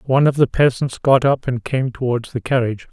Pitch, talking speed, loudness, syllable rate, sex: 125 Hz, 225 wpm, -18 LUFS, 5.7 syllables/s, male